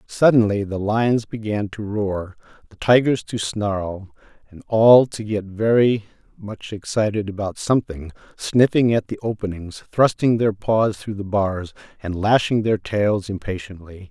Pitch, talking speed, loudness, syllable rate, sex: 105 Hz, 145 wpm, -20 LUFS, 4.2 syllables/s, male